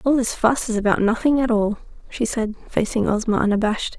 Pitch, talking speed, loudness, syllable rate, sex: 225 Hz, 195 wpm, -20 LUFS, 5.9 syllables/s, female